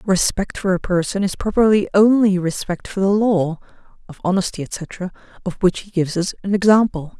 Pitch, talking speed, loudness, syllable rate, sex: 190 Hz, 175 wpm, -18 LUFS, 5.0 syllables/s, female